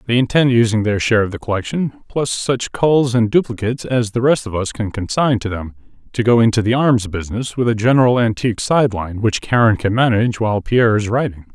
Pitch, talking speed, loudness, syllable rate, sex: 115 Hz, 210 wpm, -17 LUFS, 6.0 syllables/s, male